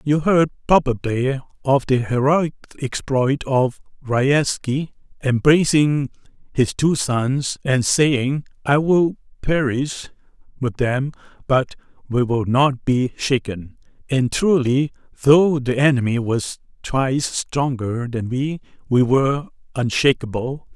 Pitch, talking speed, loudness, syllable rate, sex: 135 Hz, 115 wpm, -19 LUFS, 3.7 syllables/s, male